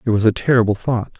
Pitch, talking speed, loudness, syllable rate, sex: 115 Hz, 250 wpm, -17 LUFS, 6.9 syllables/s, male